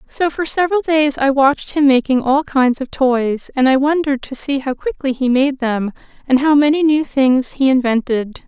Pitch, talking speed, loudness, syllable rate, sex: 270 Hz, 205 wpm, -16 LUFS, 4.9 syllables/s, female